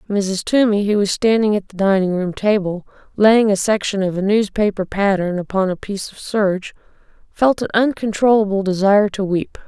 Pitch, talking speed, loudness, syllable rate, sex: 200 Hz, 175 wpm, -17 LUFS, 5.3 syllables/s, female